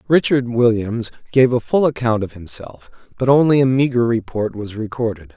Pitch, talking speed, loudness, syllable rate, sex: 120 Hz, 170 wpm, -17 LUFS, 5.1 syllables/s, male